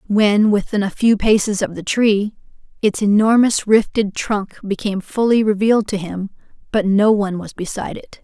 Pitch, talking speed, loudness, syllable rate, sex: 205 Hz, 165 wpm, -17 LUFS, 5.0 syllables/s, female